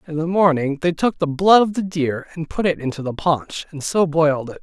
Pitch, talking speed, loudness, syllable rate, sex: 160 Hz, 260 wpm, -19 LUFS, 5.3 syllables/s, male